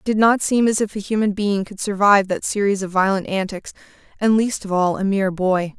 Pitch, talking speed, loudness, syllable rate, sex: 200 Hz, 240 wpm, -19 LUFS, 5.7 syllables/s, female